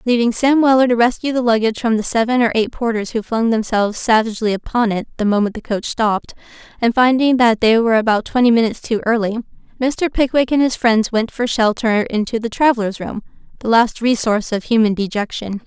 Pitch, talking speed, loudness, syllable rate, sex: 230 Hz, 195 wpm, -16 LUFS, 6.0 syllables/s, female